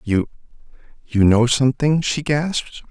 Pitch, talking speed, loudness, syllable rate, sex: 130 Hz, 105 wpm, -18 LUFS, 4.5 syllables/s, male